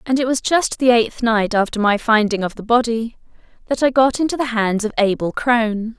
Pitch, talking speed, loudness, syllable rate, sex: 230 Hz, 220 wpm, -17 LUFS, 5.3 syllables/s, female